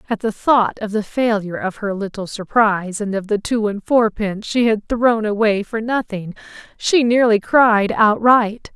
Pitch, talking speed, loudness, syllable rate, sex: 215 Hz, 180 wpm, -17 LUFS, 4.6 syllables/s, female